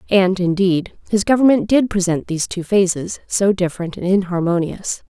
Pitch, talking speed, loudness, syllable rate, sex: 190 Hz, 155 wpm, -18 LUFS, 5.1 syllables/s, female